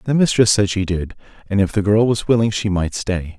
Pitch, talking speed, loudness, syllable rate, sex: 100 Hz, 250 wpm, -18 LUFS, 5.4 syllables/s, male